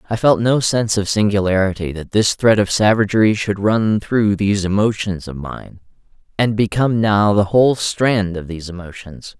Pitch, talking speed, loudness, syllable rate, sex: 105 Hz, 170 wpm, -16 LUFS, 5.1 syllables/s, male